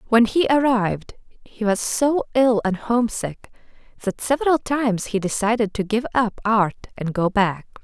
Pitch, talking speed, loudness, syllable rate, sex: 225 Hz, 160 wpm, -21 LUFS, 4.7 syllables/s, female